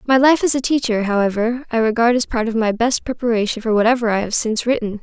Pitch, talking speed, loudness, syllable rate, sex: 230 Hz, 240 wpm, -17 LUFS, 6.5 syllables/s, female